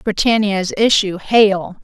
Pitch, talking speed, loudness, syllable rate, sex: 200 Hz, 100 wpm, -15 LUFS, 3.5 syllables/s, female